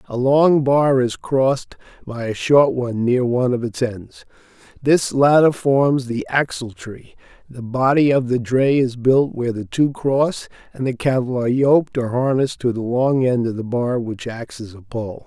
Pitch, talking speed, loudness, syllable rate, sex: 125 Hz, 190 wpm, -18 LUFS, 4.6 syllables/s, male